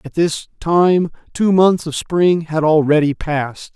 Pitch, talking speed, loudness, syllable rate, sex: 160 Hz, 160 wpm, -16 LUFS, 3.9 syllables/s, male